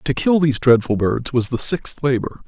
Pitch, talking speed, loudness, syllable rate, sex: 130 Hz, 220 wpm, -17 LUFS, 5.0 syllables/s, male